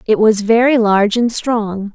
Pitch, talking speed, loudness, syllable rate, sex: 220 Hz, 185 wpm, -14 LUFS, 4.4 syllables/s, female